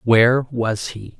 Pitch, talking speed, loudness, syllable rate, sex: 115 Hz, 150 wpm, -18 LUFS, 3.5 syllables/s, male